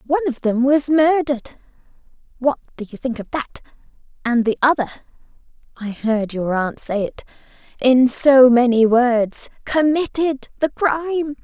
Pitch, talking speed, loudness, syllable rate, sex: 260 Hz, 130 wpm, -18 LUFS, 4.2 syllables/s, female